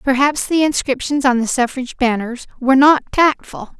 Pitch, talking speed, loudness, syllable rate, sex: 265 Hz, 160 wpm, -16 LUFS, 5.2 syllables/s, female